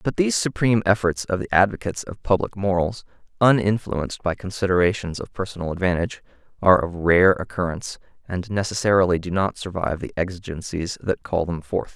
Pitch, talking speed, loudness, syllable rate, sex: 95 Hz, 155 wpm, -22 LUFS, 6.1 syllables/s, male